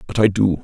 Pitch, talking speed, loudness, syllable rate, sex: 100 Hz, 285 wpm, -17 LUFS, 6.1 syllables/s, male